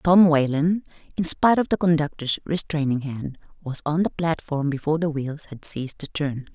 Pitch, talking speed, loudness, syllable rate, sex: 155 Hz, 185 wpm, -23 LUFS, 5.2 syllables/s, female